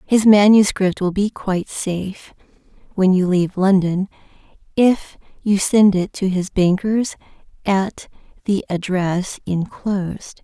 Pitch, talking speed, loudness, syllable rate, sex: 190 Hz, 120 wpm, -18 LUFS, 3.6 syllables/s, female